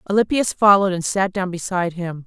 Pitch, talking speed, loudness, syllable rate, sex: 190 Hz, 185 wpm, -19 LUFS, 6.1 syllables/s, female